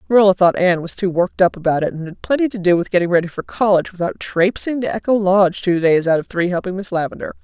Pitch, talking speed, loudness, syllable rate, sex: 185 Hz, 260 wpm, -17 LUFS, 6.8 syllables/s, female